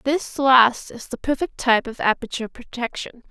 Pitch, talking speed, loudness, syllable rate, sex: 250 Hz, 165 wpm, -20 LUFS, 5.1 syllables/s, female